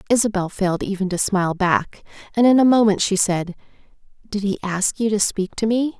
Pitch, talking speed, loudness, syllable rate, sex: 200 Hz, 200 wpm, -19 LUFS, 5.5 syllables/s, female